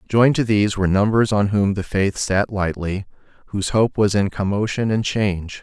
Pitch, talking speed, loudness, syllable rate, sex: 100 Hz, 190 wpm, -19 LUFS, 5.4 syllables/s, male